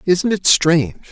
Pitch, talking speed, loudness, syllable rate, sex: 165 Hz, 160 wpm, -15 LUFS, 4.6 syllables/s, male